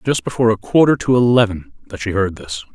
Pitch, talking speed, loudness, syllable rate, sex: 110 Hz, 265 wpm, -16 LUFS, 6.9 syllables/s, male